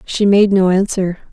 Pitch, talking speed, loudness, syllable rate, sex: 195 Hz, 180 wpm, -14 LUFS, 4.6 syllables/s, female